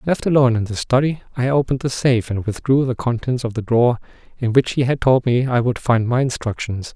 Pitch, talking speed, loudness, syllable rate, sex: 125 Hz, 235 wpm, -19 LUFS, 6.1 syllables/s, male